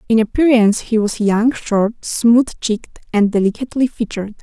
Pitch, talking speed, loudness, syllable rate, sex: 225 Hz, 150 wpm, -16 LUFS, 5.3 syllables/s, female